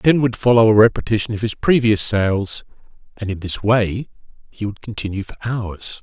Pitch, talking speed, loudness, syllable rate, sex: 110 Hz, 180 wpm, -18 LUFS, 5.0 syllables/s, male